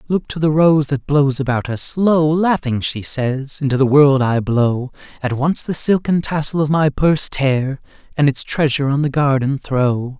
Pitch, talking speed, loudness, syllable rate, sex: 145 Hz, 190 wpm, -17 LUFS, 4.5 syllables/s, male